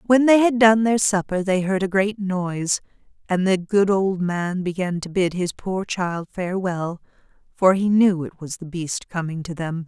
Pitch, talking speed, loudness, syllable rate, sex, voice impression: 185 Hz, 200 wpm, -21 LUFS, 4.4 syllables/s, female, feminine, adult-like, tensed, powerful, soft, clear, fluent, intellectual, calm, reassuring, elegant, lively, slightly kind